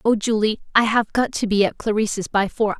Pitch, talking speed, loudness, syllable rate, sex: 215 Hz, 235 wpm, -20 LUFS, 5.5 syllables/s, female